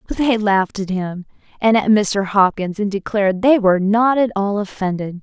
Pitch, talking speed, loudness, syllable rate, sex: 205 Hz, 195 wpm, -17 LUFS, 5.2 syllables/s, female